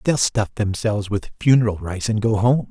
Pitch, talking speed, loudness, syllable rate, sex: 110 Hz, 200 wpm, -20 LUFS, 5.3 syllables/s, male